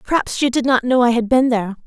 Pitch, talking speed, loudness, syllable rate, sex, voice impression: 245 Hz, 290 wpm, -16 LUFS, 6.5 syllables/s, female, very feminine, young, thin, very tensed, very powerful, very bright, hard, very clear, very fluent, slightly raspy, cute, slightly cool, slightly intellectual, very refreshing, sincere, slightly calm, slightly friendly, slightly reassuring, very unique, slightly elegant, very wild, slightly sweet, very lively, strict, very intense, sharp, very light